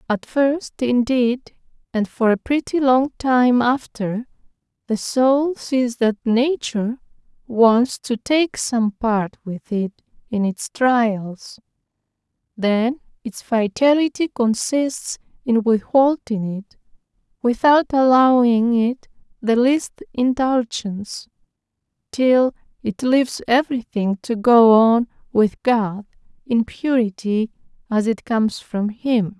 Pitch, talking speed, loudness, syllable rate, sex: 240 Hz, 110 wpm, -19 LUFS, 3.5 syllables/s, female